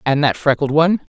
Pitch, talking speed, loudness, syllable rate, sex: 155 Hz, 205 wpm, -16 LUFS, 6.2 syllables/s, female